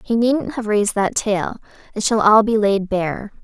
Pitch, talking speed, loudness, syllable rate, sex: 215 Hz, 210 wpm, -18 LUFS, 4.5 syllables/s, female